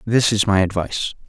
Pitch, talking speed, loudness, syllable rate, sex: 100 Hz, 190 wpm, -19 LUFS, 5.9 syllables/s, male